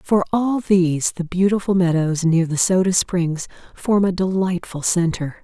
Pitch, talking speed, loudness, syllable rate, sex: 180 Hz, 155 wpm, -19 LUFS, 4.4 syllables/s, female